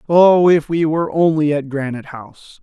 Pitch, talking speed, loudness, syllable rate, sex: 155 Hz, 185 wpm, -15 LUFS, 5.4 syllables/s, male